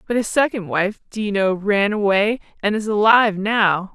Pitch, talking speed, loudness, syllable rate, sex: 205 Hz, 200 wpm, -18 LUFS, 4.9 syllables/s, female